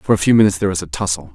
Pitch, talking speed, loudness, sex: 95 Hz, 355 wpm, -16 LUFS, male